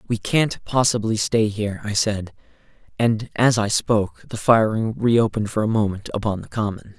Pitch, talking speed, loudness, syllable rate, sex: 110 Hz, 170 wpm, -21 LUFS, 5.0 syllables/s, male